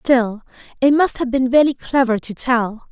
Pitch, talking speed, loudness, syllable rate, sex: 250 Hz, 185 wpm, -17 LUFS, 4.1 syllables/s, female